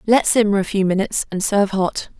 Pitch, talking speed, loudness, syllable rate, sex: 200 Hz, 220 wpm, -18 LUFS, 6.1 syllables/s, female